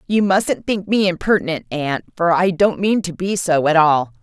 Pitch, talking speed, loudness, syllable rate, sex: 180 Hz, 215 wpm, -17 LUFS, 4.6 syllables/s, female